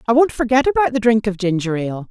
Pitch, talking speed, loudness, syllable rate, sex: 225 Hz, 255 wpm, -17 LUFS, 6.7 syllables/s, female